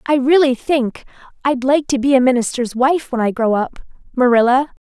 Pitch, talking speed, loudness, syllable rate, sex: 260 Hz, 180 wpm, -16 LUFS, 5.1 syllables/s, female